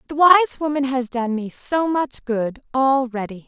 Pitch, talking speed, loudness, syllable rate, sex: 265 Hz, 175 wpm, -20 LUFS, 4.5 syllables/s, female